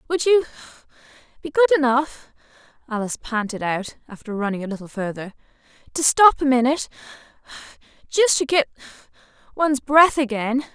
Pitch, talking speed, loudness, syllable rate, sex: 265 Hz, 110 wpm, -20 LUFS, 5.8 syllables/s, female